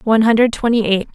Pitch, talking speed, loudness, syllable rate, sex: 225 Hz, 210 wpm, -15 LUFS, 6.9 syllables/s, female